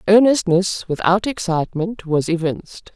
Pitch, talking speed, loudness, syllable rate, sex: 185 Hz, 100 wpm, -18 LUFS, 4.7 syllables/s, female